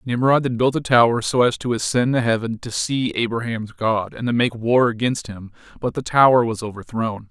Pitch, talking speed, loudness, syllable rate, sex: 120 Hz, 205 wpm, -20 LUFS, 5.1 syllables/s, male